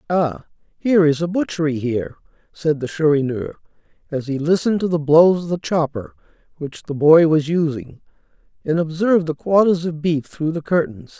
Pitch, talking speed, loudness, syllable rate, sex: 160 Hz, 170 wpm, -18 LUFS, 5.4 syllables/s, male